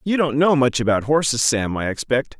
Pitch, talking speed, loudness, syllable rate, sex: 135 Hz, 225 wpm, -19 LUFS, 5.3 syllables/s, male